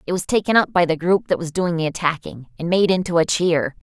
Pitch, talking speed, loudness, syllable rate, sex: 170 Hz, 260 wpm, -19 LUFS, 5.9 syllables/s, female